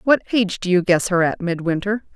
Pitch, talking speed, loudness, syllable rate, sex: 190 Hz, 220 wpm, -19 LUFS, 5.9 syllables/s, female